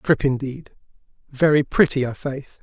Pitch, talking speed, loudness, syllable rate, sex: 140 Hz, 135 wpm, -20 LUFS, 4.4 syllables/s, male